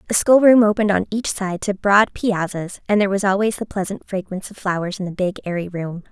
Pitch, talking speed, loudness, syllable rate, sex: 195 Hz, 225 wpm, -19 LUFS, 6.0 syllables/s, female